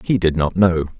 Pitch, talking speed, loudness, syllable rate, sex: 90 Hz, 240 wpm, -17 LUFS, 5.2 syllables/s, male